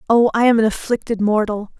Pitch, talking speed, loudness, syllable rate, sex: 220 Hz, 200 wpm, -17 LUFS, 5.9 syllables/s, female